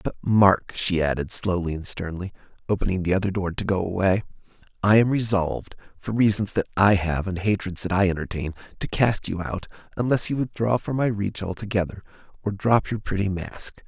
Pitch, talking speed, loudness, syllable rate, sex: 100 Hz, 185 wpm, -24 LUFS, 5.5 syllables/s, male